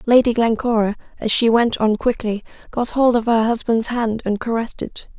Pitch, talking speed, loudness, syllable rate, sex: 230 Hz, 185 wpm, -19 LUFS, 5.4 syllables/s, female